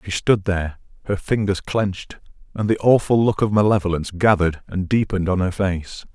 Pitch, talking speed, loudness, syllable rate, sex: 100 Hz, 175 wpm, -20 LUFS, 5.7 syllables/s, male